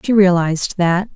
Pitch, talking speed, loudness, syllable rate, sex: 185 Hz, 155 wpm, -16 LUFS, 4.9 syllables/s, female